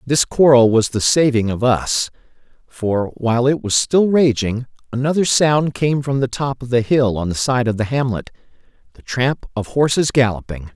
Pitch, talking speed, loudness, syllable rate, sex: 125 Hz, 180 wpm, -17 LUFS, 4.7 syllables/s, male